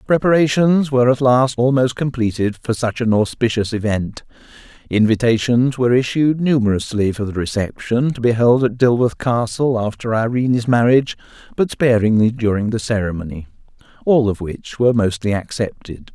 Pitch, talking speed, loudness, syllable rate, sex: 120 Hz, 140 wpm, -17 LUFS, 5.2 syllables/s, male